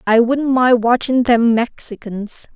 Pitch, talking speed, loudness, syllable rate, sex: 240 Hz, 140 wpm, -16 LUFS, 3.8 syllables/s, female